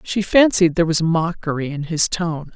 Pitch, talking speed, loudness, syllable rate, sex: 170 Hz, 190 wpm, -18 LUFS, 4.9 syllables/s, female